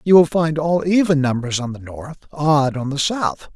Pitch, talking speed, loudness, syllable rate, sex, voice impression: 150 Hz, 220 wpm, -18 LUFS, 4.6 syllables/s, male, very masculine, slightly adult-like, thick, tensed, slightly powerful, bright, soft, clear, fluent, slightly raspy, cool, very intellectual, refreshing, sincere, very calm, very mature, friendly, reassuring, unique, slightly elegant, wild, slightly sweet, slightly lively, very kind, very modest